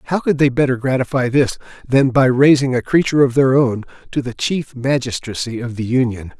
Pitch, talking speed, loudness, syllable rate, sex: 130 Hz, 195 wpm, -17 LUFS, 5.5 syllables/s, male